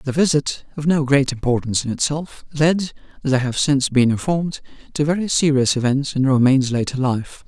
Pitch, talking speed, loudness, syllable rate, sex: 140 Hz, 170 wpm, -19 LUFS, 5.6 syllables/s, male